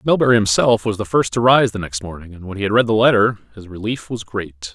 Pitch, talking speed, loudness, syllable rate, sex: 105 Hz, 265 wpm, -17 LUFS, 6.0 syllables/s, male